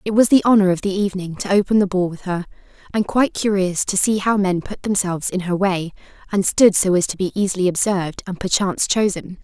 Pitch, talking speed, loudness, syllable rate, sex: 190 Hz, 230 wpm, -19 LUFS, 6.1 syllables/s, female